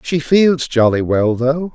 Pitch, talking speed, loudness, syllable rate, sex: 140 Hz, 170 wpm, -15 LUFS, 3.6 syllables/s, male